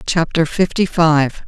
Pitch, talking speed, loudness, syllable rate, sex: 165 Hz, 120 wpm, -16 LUFS, 3.8 syllables/s, female